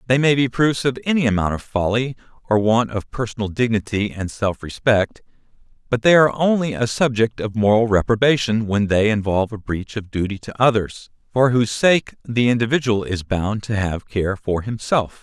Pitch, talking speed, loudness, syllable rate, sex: 115 Hz, 185 wpm, -19 LUFS, 5.2 syllables/s, male